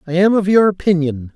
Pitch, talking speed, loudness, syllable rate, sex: 175 Hz, 220 wpm, -15 LUFS, 5.8 syllables/s, male